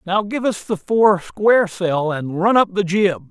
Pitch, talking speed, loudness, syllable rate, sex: 190 Hz, 200 wpm, -18 LUFS, 4.3 syllables/s, male